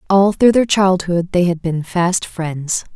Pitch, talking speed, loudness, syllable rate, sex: 180 Hz, 185 wpm, -16 LUFS, 3.7 syllables/s, female